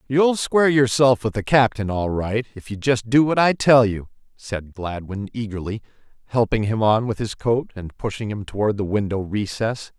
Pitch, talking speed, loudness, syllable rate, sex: 115 Hz, 190 wpm, -21 LUFS, 4.8 syllables/s, male